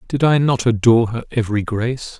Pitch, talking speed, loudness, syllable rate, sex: 120 Hz, 190 wpm, -17 LUFS, 6.2 syllables/s, male